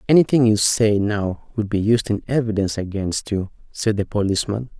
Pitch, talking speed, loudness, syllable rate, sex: 105 Hz, 175 wpm, -20 LUFS, 5.4 syllables/s, male